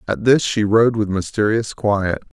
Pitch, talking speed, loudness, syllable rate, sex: 105 Hz, 175 wpm, -18 LUFS, 4.3 syllables/s, male